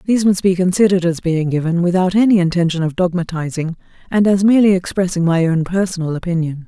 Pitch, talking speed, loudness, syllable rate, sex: 180 Hz, 180 wpm, -16 LUFS, 6.5 syllables/s, female